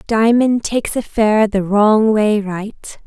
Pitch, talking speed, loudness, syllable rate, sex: 215 Hz, 155 wpm, -15 LUFS, 3.4 syllables/s, female